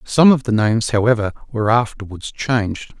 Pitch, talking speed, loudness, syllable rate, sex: 115 Hz, 160 wpm, -17 LUFS, 5.6 syllables/s, male